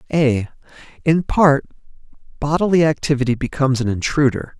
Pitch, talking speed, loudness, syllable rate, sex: 140 Hz, 105 wpm, -18 LUFS, 6.2 syllables/s, male